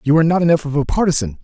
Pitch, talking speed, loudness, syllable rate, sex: 155 Hz, 295 wpm, -16 LUFS, 8.3 syllables/s, male